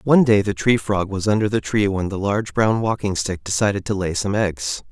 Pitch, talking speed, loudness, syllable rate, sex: 100 Hz, 245 wpm, -20 LUFS, 5.5 syllables/s, male